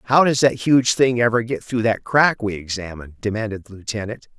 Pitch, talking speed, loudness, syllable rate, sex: 115 Hz, 205 wpm, -19 LUFS, 5.6 syllables/s, male